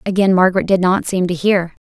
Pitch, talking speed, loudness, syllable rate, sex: 185 Hz, 225 wpm, -15 LUFS, 6.1 syllables/s, female